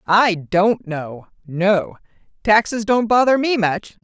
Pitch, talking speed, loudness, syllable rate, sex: 200 Hz, 135 wpm, -18 LUFS, 3.5 syllables/s, female